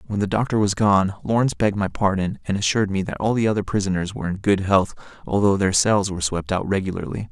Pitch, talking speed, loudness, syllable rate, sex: 100 Hz, 230 wpm, -21 LUFS, 6.6 syllables/s, male